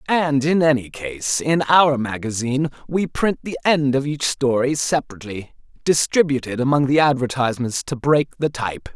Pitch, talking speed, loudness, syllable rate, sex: 140 Hz, 155 wpm, -19 LUFS, 5.0 syllables/s, male